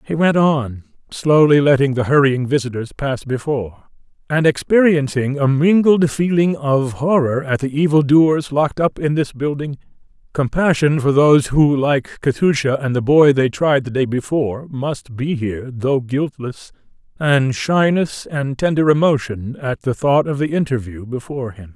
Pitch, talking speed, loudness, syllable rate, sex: 140 Hz, 160 wpm, -17 LUFS, 4.6 syllables/s, male